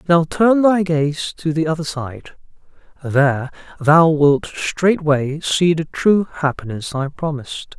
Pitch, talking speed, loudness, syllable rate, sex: 155 Hz, 140 wpm, -17 LUFS, 3.8 syllables/s, male